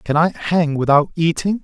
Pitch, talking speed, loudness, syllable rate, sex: 160 Hz, 185 wpm, -17 LUFS, 4.5 syllables/s, male